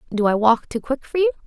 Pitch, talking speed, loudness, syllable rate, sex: 235 Hz, 285 wpm, -20 LUFS, 6.4 syllables/s, female